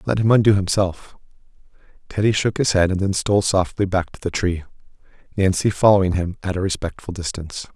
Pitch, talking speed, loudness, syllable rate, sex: 95 Hz, 180 wpm, -20 LUFS, 5.9 syllables/s, male